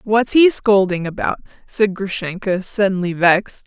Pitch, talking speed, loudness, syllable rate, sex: 200 Hz, 130 wpm, -17 LUFS, 4.6 syllables/s, female